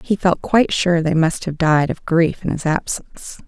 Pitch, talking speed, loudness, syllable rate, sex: 170 Hz, 225 wpm, -18 LUFS, 4.9 syllables/s, female